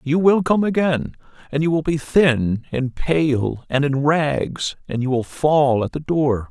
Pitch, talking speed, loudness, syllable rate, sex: 145 Hz, 195 wpm, -19 LUFS, 3.8 syllables/s, male